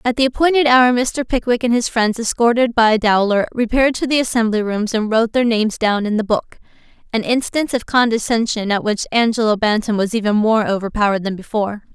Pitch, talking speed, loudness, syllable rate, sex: 225 Hz, 190 wpm, -17 LUFS, 5.9 syllables/s, female